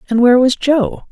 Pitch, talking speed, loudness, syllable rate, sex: 250 Hz, 215 wpm, -13 LUFS, 6.0 syllables/s, female